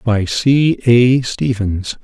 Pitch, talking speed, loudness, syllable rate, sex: 115 Hz, 120 wpm, -14 LUFS, 2.7 syllables/s, male